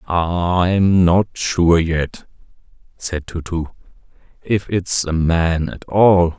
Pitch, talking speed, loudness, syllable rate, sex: 85 Hz, 120 wpm, -17 LUFS, 2.7 syllables/s, male